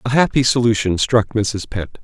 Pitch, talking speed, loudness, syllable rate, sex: 115 Hz, 175 wpm, -17 LUFS, 4.7 syllables/s, male